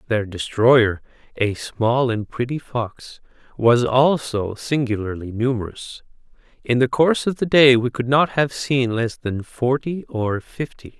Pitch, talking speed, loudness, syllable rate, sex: 125 Hz, 145 wpm, -20 LUFS, 4.0 syllables/s, male